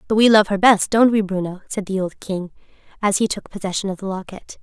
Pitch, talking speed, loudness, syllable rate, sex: 200 Hz, 245 wpm, -19 LUFS, 5.9 syllables/s, female